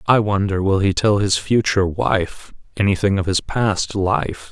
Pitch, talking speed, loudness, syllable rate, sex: 100 Hz, 175 wpm, -18 LUFS, 4.3 syllables/s, male